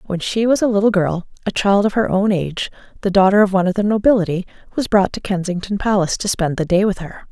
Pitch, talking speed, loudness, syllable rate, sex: 195 Hz, 245 wpm, -17 LUFS, 6.5 syllables/s, female